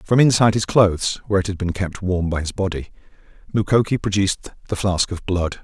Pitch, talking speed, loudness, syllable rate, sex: 95 Hz, 200 wpm, -20 LUFS, 6.0 syllables/s, male